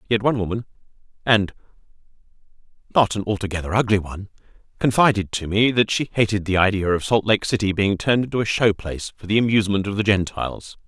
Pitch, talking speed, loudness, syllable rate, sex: 105 Hz, 180 wpm, -20 LUFS, 6.6 syllables/s, male